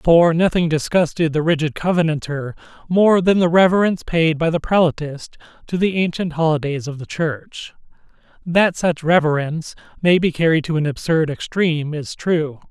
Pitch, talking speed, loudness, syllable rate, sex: 160 Hz, 155 wpm, -18 LUFS, 5.0 syllables/s, male